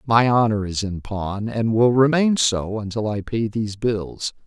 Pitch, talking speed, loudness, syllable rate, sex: 110 Hz, 190 wpm, -21 LUFS, 4.2 syllables/s, male